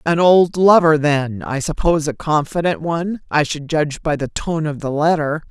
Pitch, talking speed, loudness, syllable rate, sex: 160 Hz, 195 wpm, -17 LUFS, 4.9 syllables/s, female